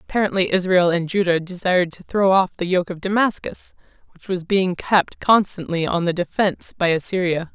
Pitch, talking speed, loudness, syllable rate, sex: 180 Hz, 175 wpm, -20 LUFS, 5.2 syllables/s, female